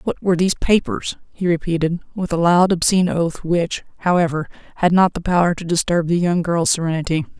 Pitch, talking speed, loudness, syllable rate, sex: 170 Hz, 185 wpm, -18 LUFS, 5.8 syllables/s, female